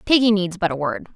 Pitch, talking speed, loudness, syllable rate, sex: 195 Hz, 260 wpm, -20 LUFS, 6.1 syllables/s, female